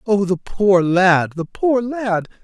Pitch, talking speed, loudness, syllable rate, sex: 195 Hz, 175 wpm, -17 LUFS, 3.3 syllables/s, male